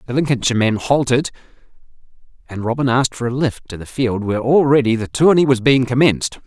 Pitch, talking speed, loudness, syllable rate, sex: 125 Hz, 185 wpm, -16 LUFS, 6.3 syllables/s, male